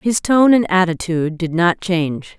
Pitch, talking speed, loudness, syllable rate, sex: 180 Hz, 175 wpm, -16 LUFS, 4.7 syllables/s, female